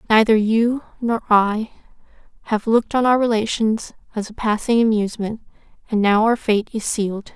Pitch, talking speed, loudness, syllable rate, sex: 220 Hz, 155 wpm, -19 LUFS, 5.2 syllables/s, female